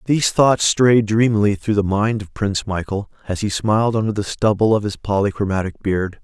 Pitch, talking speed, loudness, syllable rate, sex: 105 Hz, 195 wpm, -18 LUFS, 5.4 syllables/s, male